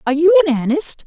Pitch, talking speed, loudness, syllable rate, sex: 315 Hz, 225 wpm, -15 LUFS, 7.6 syllables/s, female